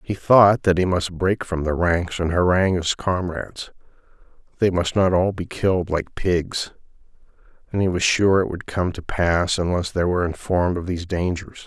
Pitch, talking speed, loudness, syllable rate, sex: 90 Hz, 190 wpm, -21 LUFS, 4.9 syllables/s, male